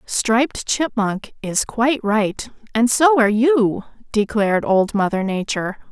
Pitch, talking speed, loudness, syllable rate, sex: 225 Hz, 130 wpm, -18 LUFS, 4.3 syllables/s, female